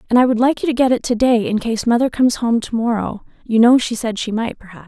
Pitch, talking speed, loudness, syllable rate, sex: 235 Hz, 295 wpm, -17 LUFS, 6.2 syllables/s, female